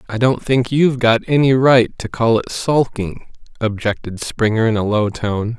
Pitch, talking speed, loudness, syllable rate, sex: 115 Hz, 185 wpm, -17 LUFS, 4.5 syllables/s, male